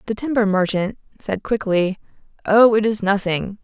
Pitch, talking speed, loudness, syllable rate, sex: 205 Hz, 150 wpm, -19 LUFS, 4.7 syllables/s, female